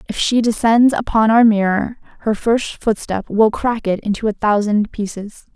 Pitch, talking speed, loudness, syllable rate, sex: 215 Hz, 175 wpm, -16 LUFS, 4.6 syllables/s, female